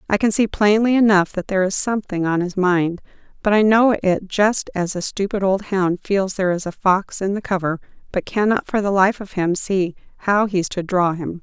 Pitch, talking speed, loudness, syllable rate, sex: 195 Hz, 225 wpm, -19 LUFS, 5.1 syllables/s, female